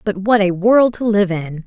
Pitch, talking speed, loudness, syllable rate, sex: 200 Hz, 255 wpm, -15 LUFS, 4.5 syllables/s, female